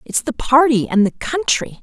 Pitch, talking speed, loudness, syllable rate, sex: 255 Hz, 195 wpm, -16 LUFS, 4.7 syllables/s, female